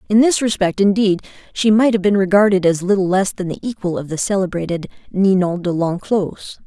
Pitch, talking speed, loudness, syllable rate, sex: 190 Hz, 190 wpm, -17 LUFS, 5.4 syllables/s, female